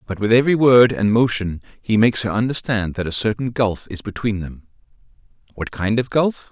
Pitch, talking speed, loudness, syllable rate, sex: 110 Hz, 195 wpm, -18 LUFS, 5.4 syllables/s, male